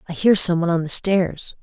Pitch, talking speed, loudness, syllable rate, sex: 175 Hz, 260 wpm, -18 LUFS, 5.8 syllables/s, female